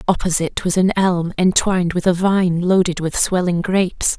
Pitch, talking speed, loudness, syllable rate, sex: 180 Hz, 170 wpm, -17 LUFS, 5.0 syllables/s, female